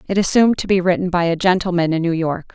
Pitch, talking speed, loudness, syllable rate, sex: 180 Hz, 260 wpm, -17 LUFS, 6.8 syllables/s, female